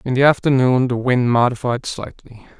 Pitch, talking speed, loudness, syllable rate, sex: 125 Hz, 160 wpm, -17 LUFS, 5.0 syllables/s, male